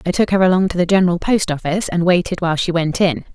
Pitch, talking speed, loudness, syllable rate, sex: 180 Hz, 270 wpm, -16 LUFS, 6.9 syllables/s, female